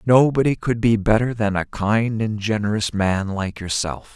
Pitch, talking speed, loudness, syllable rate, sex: 110 Hz, 175 wpm, -20 LUFS, 4.4 syllables/s, male